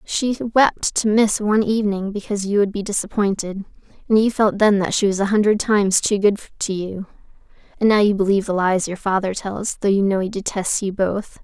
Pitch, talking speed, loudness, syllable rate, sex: 200 Hz, 215 wpm, -19 LUFS, 5.6 syllables/s, female